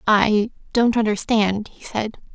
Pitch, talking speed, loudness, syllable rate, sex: 215 Hz, 130 wpm, -20 LUFS, 3.8 syllables/s, female